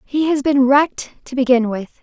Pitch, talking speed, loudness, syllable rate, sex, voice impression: 265 Hz, 205 wpm, -16 LUFS, 5.0 syllables/s, female, feminine, slightly young, bright, soft, fluent, cute, calm, friendly, elegant, kind